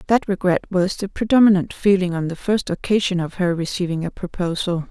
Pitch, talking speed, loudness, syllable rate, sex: 185 Hz, 185 wpm, -20 LUFS, 5.6 syllables/s, female